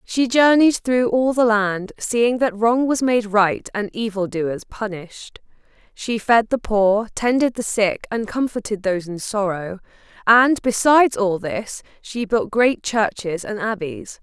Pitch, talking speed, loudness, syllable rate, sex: 220 Hz, 155 wpm, -19 LUFS, 4.0 syllables/s, female